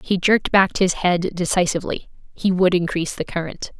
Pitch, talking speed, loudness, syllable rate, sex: 180 Hz, 175 wpm, -20 LUFS, 5.6 syllables/s, female